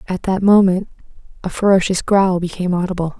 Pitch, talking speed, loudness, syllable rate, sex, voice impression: 185 Hz, 150 wpm, -16 LUFS, 6.1 syllables/s, female, very feminine, slightly young, slightly adult-like, very thin, very relaxed, very weak, very dark, soft, slightly muffled, very fluent, very cute, intellectual, refreshing, very sincere, very calm, very friendly, very reassuring, very unique, very elegant, very sweet, very kind, very modest